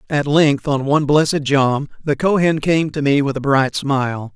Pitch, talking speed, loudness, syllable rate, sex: 145 Hz, 205 wpm, -17 LUFS, 4.7 syllables/s, male